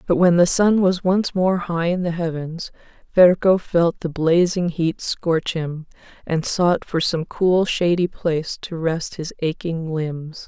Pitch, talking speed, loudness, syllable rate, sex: 170 Hz, 170 wpm, -20 LUFS, 3.8 syllables/s, female